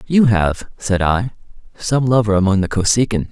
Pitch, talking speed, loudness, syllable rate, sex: 105 Hz, 165 wpm, -16 LUFS, 4.9 syllables/s, male